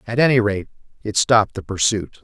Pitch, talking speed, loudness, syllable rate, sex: 105 Hz, 190 wpm, -19 LUFS, 5.8 syllables/s, male